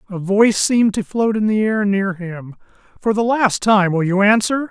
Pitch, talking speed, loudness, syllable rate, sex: 205 Hz, 205 wpm, -16 LUFS, 4.9 syllables/s, male